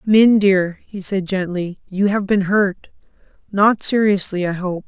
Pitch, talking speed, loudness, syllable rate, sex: 195 Hz, 150 wpm, -18 LUFS, 3.9 syllables/s, female